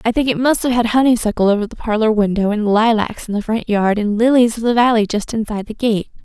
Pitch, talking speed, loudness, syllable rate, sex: 220 Hz, 250 wpm, -16 LUFS, 6.2 syllables/s, female